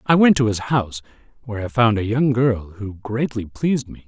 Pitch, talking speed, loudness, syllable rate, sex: 115 Hz, 220 wpm, -20 LUFS, 5.4 syllables/s, male